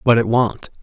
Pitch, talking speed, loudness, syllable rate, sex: 115 Hz, 220 wpm, -17 LUFS, 4.7 syllables/s, male